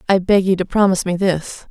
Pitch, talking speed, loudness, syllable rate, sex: 185 Hz, 245 wpm, -17 LUFS, 6.0 syllables/s, female